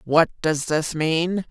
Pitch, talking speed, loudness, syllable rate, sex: 160 Hz, 160 wpm, -22 LUFS, 3.2 syllables/s, female